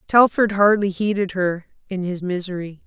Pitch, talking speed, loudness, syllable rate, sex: 190 Hz, 145 wpm, -20 LUFS, 4.8 syllables/s, female